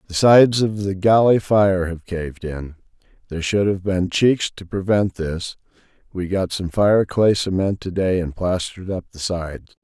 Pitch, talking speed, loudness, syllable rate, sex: 95 Hz, 175 wpm, -19 LUFS, 4.7 syllables/s, male